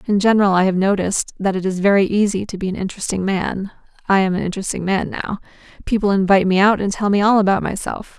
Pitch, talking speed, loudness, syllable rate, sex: 195 Hz, 225 wpm, -18 LUFS, 5.8 syllables/s, female